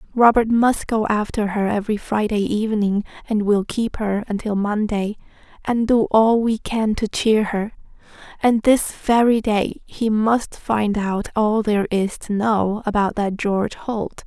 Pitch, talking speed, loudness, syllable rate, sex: 215 Hz, 165 wpm, -20 LUFS, 4.3 syllables/s, female